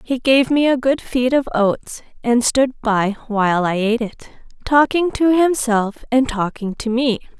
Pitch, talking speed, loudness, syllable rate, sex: 245 Hz, 180 wpm, -17 LUFS, 4.2 syllables/s, female